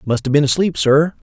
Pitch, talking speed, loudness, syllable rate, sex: 145 Hz, 230 wpm, -15 LUFS, 5.7 syllables/s, male